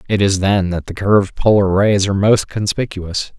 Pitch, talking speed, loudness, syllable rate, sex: 100 Hz, 195 wpm, -16 LUFS, 5.0 syllables/s, male